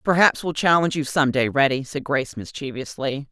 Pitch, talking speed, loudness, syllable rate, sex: 140 Hz, 180 wpm, -21 LUFS, 5.6 syllables/s, female